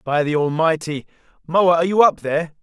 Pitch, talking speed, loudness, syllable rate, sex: 160 Hz, 185 wpm, -18 LUFS, 5.8 syllables/s, male